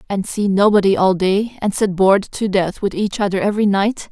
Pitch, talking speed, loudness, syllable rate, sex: 200 Hz, 220 wpm, -17 LUFS, 5.4 syllables/s, female